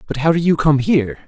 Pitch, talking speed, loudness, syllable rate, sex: 150 Hz, 285 wpm, -16 LUFS, 6.3 syllables/s, male